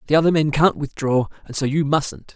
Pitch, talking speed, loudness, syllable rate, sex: 150 Hz, 230 wpm, -20 LUFS, 5.4 syllables/s, male